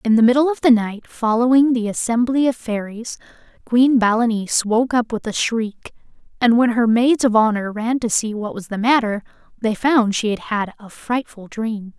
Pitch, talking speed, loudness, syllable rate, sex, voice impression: 230 Hz, 195 wpm, -18 LUFS, 4.9 syllables/s, female, feminine, slightly young, tensed, powerful, clear, fluent, slightly cute, calm, friendly, reassuring, lively, slightly sharp